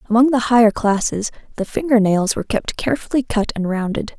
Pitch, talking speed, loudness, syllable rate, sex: 225 Hz, 185 wpm, -18 LUFS, 6.0 syllables/s, female